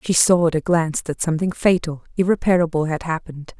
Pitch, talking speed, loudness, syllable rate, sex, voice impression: 165 Hz, 185 wpm, -19 LUFS, 6.3 syllables/s, female, feminine, adult-like, relaxed, slightly weak, soft, raspy, intellectual, calm, reassuring, elegant, kind, modest